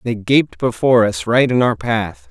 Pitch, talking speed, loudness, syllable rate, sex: 110 Hz, 210 wpm, -16 LUFS, 4.5 syllables/s, male